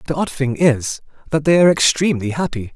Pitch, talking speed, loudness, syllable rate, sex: 145 Hz, 195 wpm, -17 LUFS, 6.2 syllables/s, male